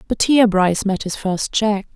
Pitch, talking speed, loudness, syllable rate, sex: 205 Hz, 215 wpm, -17 LUFS, 5.2 syllables/s, female